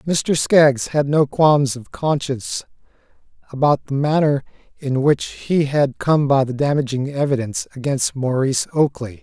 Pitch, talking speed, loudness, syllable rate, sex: 140 Hz, 145 wpm, -18 LUFS, 4.4 syllables/s, male